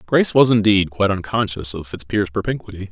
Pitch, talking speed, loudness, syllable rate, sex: 100 Hz, 165 wpm, -18 LUFS, 6.1 syllables/s, male